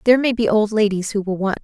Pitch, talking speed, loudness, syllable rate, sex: 215 Hz, 295 wpm, -18 LUFS, 6.9 syllables/s, female